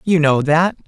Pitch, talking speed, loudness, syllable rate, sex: 165 Hz, 205 wpm, -15 LUFS, 4.4 syllables/s, male